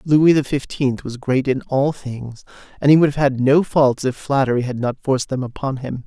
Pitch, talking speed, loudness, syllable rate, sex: 135 Hz, 230 wpm, -18 LUFS, 5.0 syllables/s, male